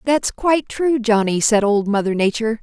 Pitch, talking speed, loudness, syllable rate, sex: 230 Hz, 185 wpm, -18 LUFS, 5.2 syllables/s, female